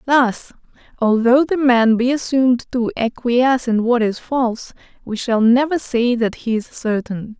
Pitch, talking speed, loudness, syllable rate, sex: 245 Hz, 160 wpm, -17 LUFS, 4.4 syllables/s, female